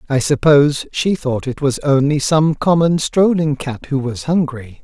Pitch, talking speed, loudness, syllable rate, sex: 145 Hz, 175 wpm, -16 LUFS, 4.4 syllables/s, male